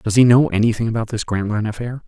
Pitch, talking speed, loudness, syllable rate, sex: 110 Hz, 230 wpm, -18 LUFS, 7.0 syllables/s, male